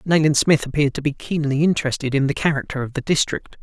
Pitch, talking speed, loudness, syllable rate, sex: 145 Hz, 215 wpm, -20 LUFS, 6.6 syllables/s, male